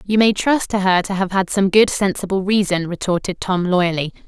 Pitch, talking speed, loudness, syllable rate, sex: 190 Hz, 210 wpm, -18 LUFS, 5.2 syllables/s, female